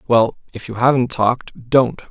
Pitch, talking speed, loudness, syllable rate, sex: 120 Hz, 170 wpm, -17 LUFS, 4.7 syllables/s, male